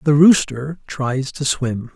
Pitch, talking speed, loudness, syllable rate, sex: 140 Hz, 155 wpm, -18 LUFS, 3.4 syllables/s, male